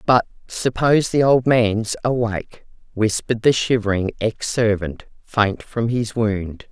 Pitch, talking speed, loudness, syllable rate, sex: 110 Hz, 135 wpm, -20 LUFS, 4.1 syllables/s, female